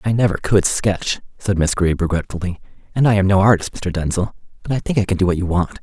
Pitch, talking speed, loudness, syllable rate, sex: 95 Hz, 245 wpm, -18 LUFS, 6.1 syllables/s, male